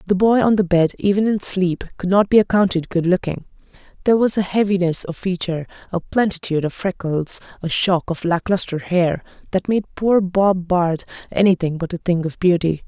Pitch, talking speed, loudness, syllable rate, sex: 185 Hz, 190 wpm, -19 LUFS, 5.3 syllables/s, female